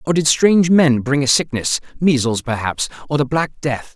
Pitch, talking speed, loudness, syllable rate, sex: 140 Hz, 180 wpm, -17 LUFS, 5.0 syllables/s, male